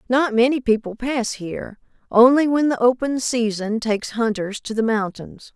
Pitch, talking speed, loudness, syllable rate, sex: 235 Hz, 160 wpm, -20 LUFS, 4.8 syllables/s, female